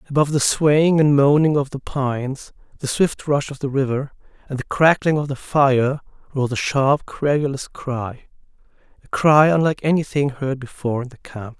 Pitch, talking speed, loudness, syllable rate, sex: 140 Hz, 170 wpm, -19 LUFS, 5.0 syllables/s, male